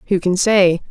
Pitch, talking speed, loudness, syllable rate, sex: 190 Hz, 200 wpm, -15 LUFS, 4.8 syllables/s, female